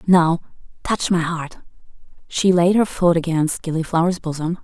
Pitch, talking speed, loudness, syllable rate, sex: 170 Hz, 145 wpm, -19 LUFS, 4.7 syllables/s, female